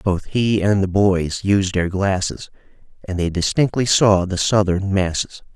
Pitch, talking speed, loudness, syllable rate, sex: 95 Hz, 160 wpm, -18 LUFS, 4.1 syllables/s, male